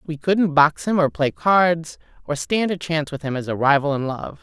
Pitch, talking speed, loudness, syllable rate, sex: 160 Hz, 245 wpm, -20 LUFS, 4.9 syllables/s, female